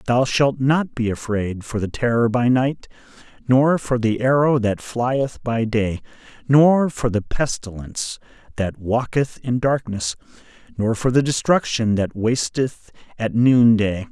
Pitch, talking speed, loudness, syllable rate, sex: 120 Hz, 145 wpm, -20 LUFS, 4.0 syllables/s, male